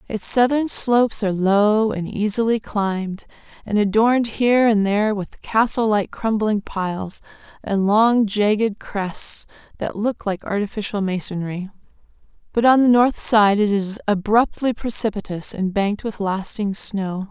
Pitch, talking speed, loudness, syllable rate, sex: 210 Hz, 140 wpm, -20 LUFS, 4.4 syllables/s, female